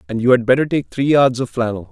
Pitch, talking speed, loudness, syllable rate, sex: 125 Hz, 280 wpm, -16 LUFS, 6.4 syllables/s, male